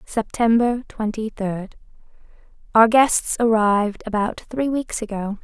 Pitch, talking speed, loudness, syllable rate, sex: 220 Hz, 100 wpm, -20 LUFS, 4.0 syllables/s, female